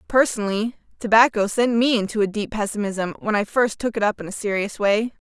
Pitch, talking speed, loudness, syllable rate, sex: 215 Hz, 205 wpm, -21 LUFS, 5.8 syllables/s, female